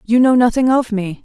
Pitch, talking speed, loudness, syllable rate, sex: 235 Hz, 240 wpm, -14 LUFS, 5.3 syllables/s, female